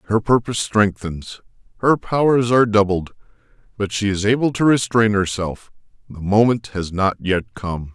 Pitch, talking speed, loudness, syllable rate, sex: 105 Hz, 150 wpm, -19 LUFS, 4.7 syllables/s, male